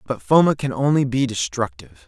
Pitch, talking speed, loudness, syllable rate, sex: 130 Hz, 175 wpm, -20 LUFS, 5.7 syllables/s, male